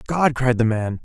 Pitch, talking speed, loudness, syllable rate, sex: 125 Hz, 230 wpm, -19 LUFS, 4.6 syllables/s, male